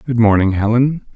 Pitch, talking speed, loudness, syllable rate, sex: 115 Hz, 155 wpm, -15 LUFS, 5.3 syllables/s, male